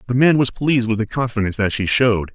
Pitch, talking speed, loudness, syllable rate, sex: 115 Hz, 255 wpm, -18 LUFS, 6.9 syllables/s, male